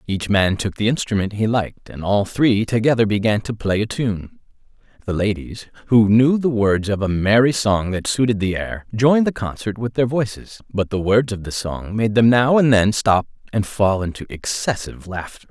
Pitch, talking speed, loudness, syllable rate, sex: 110 Hz, 205 wpm, -19 LUFS, 5.0 syllables/s, male